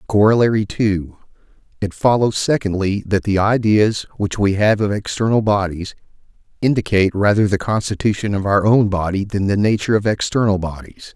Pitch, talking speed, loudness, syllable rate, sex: 100 Hz, 145 wpm, -17 LUFS, 5.4 syllables/s, male